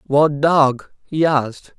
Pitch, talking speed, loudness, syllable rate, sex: 145 Hz, 135 wpm, -17 LUFS, 3.6 syllables/s, male